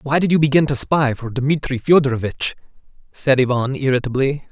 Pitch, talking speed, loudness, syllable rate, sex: 135 Hz, 160 wpm, -18 LUFS, 5.4 syllables/s, male